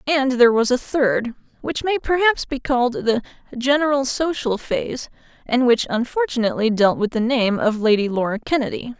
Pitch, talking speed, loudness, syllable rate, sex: 245 Hz, 165 wpm, -19 LUFS, 5.4 syllables/s, female